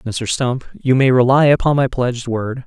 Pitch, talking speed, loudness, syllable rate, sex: 125 Hz, 205 wpm, -16 LUFS, 4.3 syllables/s, male